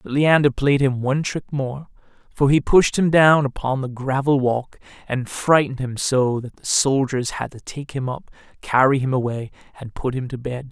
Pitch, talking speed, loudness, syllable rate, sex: 135 Hz, 200 wpm, -20 LUFS, 4.8 syllables/s, male